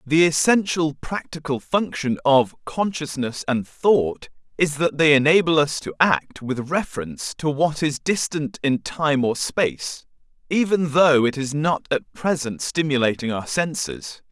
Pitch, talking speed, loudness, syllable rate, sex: 150 Hz, 145 wpm, -21 LUFS, 4.2 syllables/s, male